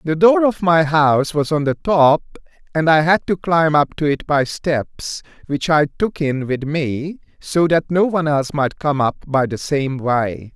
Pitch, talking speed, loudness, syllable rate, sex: 150 Hz, 210 wpm, -17 LUFS, 4.3 syllables/s, male